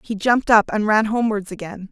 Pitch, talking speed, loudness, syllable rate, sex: 210 Hz, 220 wpm, -18 LUFS, 6.1 syllables/s, female